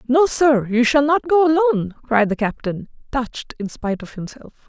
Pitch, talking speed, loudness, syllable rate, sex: 260 Hz, 190 wpm, -19 LUFS, 5.4 syllables/s, female